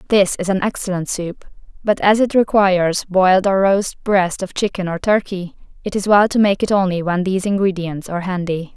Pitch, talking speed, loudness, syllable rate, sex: 190 Hz, 200 wpm, -17 LUFS, 5.3 syllables/s, female